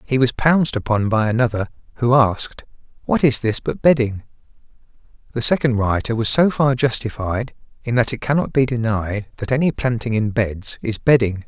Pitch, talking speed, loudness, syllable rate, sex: 120 Hz, 175 wpm, -19 LUFS, 5.2 syllables/s, male